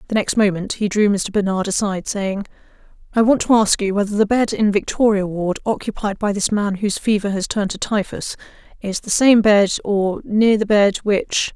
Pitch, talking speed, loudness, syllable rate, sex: 205 Hz, 205 wpm, -18 LUFS, 5.3 syllables/s, female